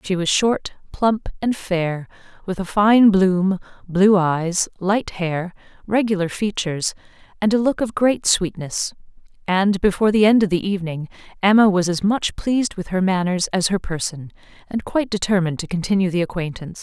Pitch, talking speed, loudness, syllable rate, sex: 190 Hz, 170 wpm, -19 LUFS, 5.1 syllables/s, female